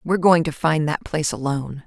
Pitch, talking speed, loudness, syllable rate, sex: 155 Hz, 225 wpm, -21 LUFS, 6.2 syllables/s, female